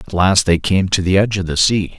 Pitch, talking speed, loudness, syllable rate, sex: 95 Hz, 300 wpm, -15 LUFS, 6.0 syllables/s, male